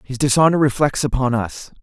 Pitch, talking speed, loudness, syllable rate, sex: 135 Hz, 165 wpm, -17 LUFS, 5.4 syllables/s, male